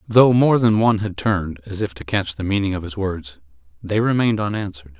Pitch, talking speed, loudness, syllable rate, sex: 100 Hz, 215 wpm, -20 LUFS, 5.9 syllables/s, male